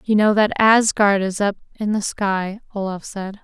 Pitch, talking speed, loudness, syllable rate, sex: 205 Hz, 190 wpm, -19 LUFS, 4.3 syllables/s, female